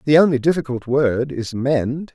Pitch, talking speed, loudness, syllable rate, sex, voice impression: 135 Hz, 170 wpm, -19 LUFS, 4.5 syllables/s, male, masculine, very adult-like, slightly thick, slightly intellectual, calm, slightly elegant, slightly sweet